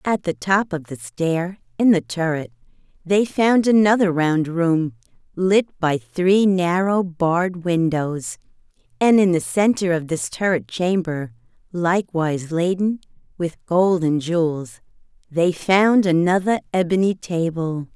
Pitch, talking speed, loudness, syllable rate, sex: 175 Hz, 130 wpm, -20 LUFS, 4.0 syllables/s, female